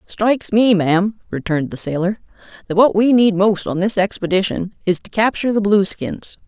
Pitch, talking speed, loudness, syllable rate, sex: 200 Hz, 175 wpm, -17 LUFS, 5.3 syllables/s, female